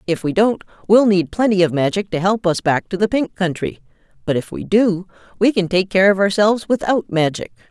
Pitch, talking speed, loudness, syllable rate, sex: 190 Hz, 220 wpm, -17 LUFS, 5.5 syllables/s, female